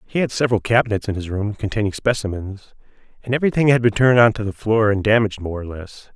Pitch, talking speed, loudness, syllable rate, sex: 110 Hz, 225 wpm, -19 LUFS, 6.7 syllables/s, male